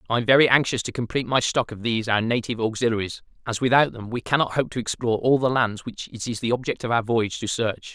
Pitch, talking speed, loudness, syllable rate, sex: 120 Hz, 255 wpm, -23 LUFS, 6.7 syllables/s, male